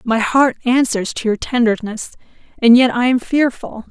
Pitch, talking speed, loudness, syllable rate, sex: 240 Hz, 170 wpm, -15 LUFS, 4.6 syllables/s, female